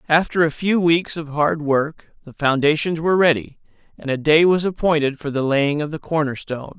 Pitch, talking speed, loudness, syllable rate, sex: 155 Hz, 205 wpm, -19 LUFS, 5.3 syllables/s, male